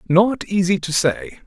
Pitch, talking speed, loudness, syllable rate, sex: 175 Hz, 165 wpm, -19 LUFS, 4.4 syllables/s, male